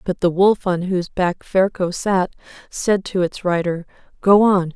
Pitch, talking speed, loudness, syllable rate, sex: 185 Hz, 175 wpm, -19 LUFS, 4.3 syllables/s, female